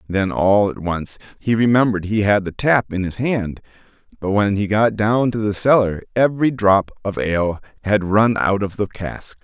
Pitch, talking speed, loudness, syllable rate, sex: 105 Hz, 195 wpm, -18 LUFS, 4.8 syllables/s, male